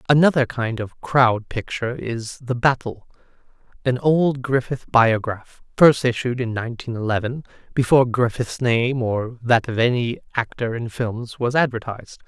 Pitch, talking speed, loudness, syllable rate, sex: 120 Hz, 140 wpm, -21 LUFS, 4.6 syllables/s, male